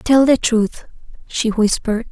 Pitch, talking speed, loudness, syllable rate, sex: 230 Hz, 140 wpm, -17 LUFS, 4.2 syllables/s, female